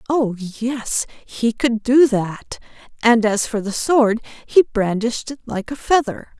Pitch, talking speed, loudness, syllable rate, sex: 235 Hz, 160 wpm, -19 LUFS, 3.6 syllables/s, female